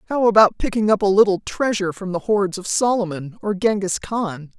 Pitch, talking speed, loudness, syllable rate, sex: 200 Hz, 195 wpm, -19 LUFS, 5.4 syllables/s, female